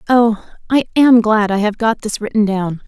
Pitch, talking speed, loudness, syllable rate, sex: 220 Hz, 210 wpm, -15 LUFS, 4.8 syllables/s, female